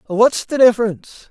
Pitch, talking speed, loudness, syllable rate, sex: 225 Hz, 140 wpm, -15 LUFS, 6.4 syllables/s, male